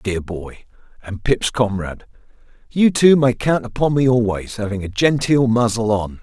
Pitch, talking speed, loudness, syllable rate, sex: 115 Hz, 175 wpm, -18 LUFS, 4.7 syllables/s, male